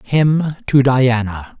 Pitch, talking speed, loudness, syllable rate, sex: 130 Hz, 115 wpm, -15 LUFS, 3.2 syllables/s, male